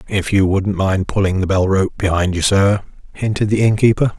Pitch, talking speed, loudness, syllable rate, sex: 100 Hz, 200 wpm, -16 LUFS, 5.2 syllables/s, male